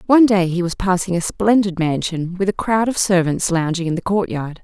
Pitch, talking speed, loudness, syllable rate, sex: 185 Hz, 220 wpm, -18 LUFS, 5.4 syllables/s, female